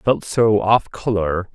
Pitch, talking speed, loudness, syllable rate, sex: 100 Hz, 155 wpm, -18 LUFS, 3.4 syllables/s, male